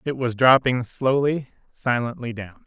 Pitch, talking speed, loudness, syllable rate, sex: 125 Hz, 135 wpm, -21 LUFS, 4.3 syllables/s, male